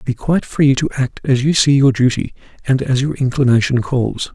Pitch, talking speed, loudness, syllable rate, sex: 130 Hz, 205 wpm, -16 LUFS, 5.1 syllables/s, male